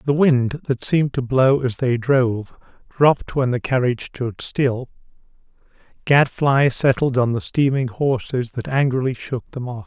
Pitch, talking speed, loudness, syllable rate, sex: 130 Hz, 160 wpm, -19 LUFS, 4.5 syllables/s, male